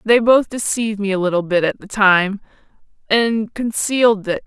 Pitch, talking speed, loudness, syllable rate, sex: 210 Hz, 175 wpm, -17 LUFS, 4.9 syllables/s, female